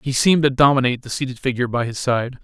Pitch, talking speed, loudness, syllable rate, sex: 130 Hz, 245 wpm, -19 LUFS, 7.3 syllables/s, male